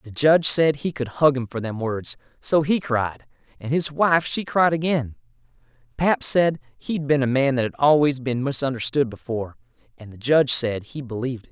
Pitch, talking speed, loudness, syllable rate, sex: 135 Hz, 200 wpm, -21 LUFS, 5.1 syllables/s, male